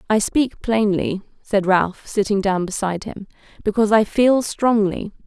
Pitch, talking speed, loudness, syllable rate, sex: 205 Hz, 150 wpm, -19 LUFS, 4.6 syllables/s, female